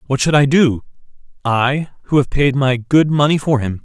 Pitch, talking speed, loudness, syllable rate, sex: 135 Hz, 190 wpm, -15 LUFS, 4.9 syllables/s, male